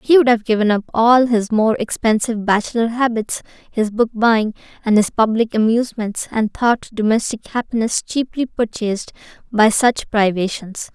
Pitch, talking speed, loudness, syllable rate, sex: 225 Hz, 145 wpm, -17 LUFS, 4.9 syllables/s, female